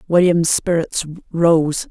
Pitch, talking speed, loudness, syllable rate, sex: 170 Hz, 95 wpm, -17 LUFS, 4.8 syllables/s, female